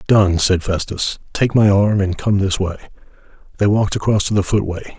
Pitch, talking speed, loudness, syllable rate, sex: 100 Hz, 195 wpm, -17 LUFS, 5.4 syllables/s, male